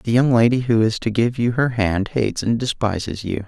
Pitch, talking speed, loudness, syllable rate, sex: 115 Hz, 240 wpm, -19 LUFS, 5.3 syllables/s, male